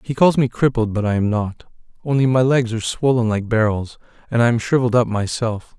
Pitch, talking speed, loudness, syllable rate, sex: 115 Hz, 220 wpm, -18 LUFS, 5.9 syllables/s, male